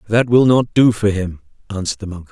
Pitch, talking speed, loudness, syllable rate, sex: 105 Hz, 235 wpm, -16 LUFS, 6.0 syllables/s, male